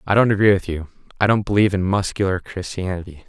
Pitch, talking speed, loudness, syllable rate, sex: 95 Hz, 185 wpm, -20 LUFS, 6.7 syllables/s, male